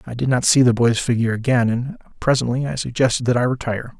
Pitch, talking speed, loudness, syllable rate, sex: 120 Hz, 225 wpm, -19 LUFS, 6.6 syllables/s, male